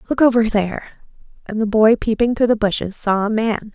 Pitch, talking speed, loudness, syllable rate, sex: 220 Hz, 210 wpm, -17 LUFS, 5.7 syllables/s, female